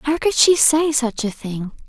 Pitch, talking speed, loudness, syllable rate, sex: 270 Hz, 225 wpm, -17 LUFS, 4.1 syllables/s, female